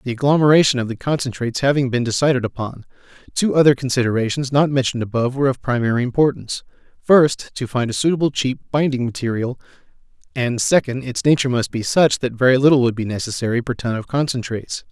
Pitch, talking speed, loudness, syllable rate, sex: 130 Hz, 175 wpm, -18 LUFS, 6.6 syllables/s, male